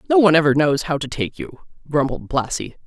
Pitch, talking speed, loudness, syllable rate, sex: 155 Hz, 210 wpm, -19 LUFS, 6.1 syllables/s, female